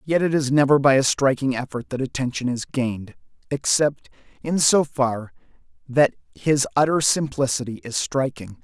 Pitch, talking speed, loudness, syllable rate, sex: 135 Hz, 155 wpm, -21 LUFS, 4.9 syllables/s, male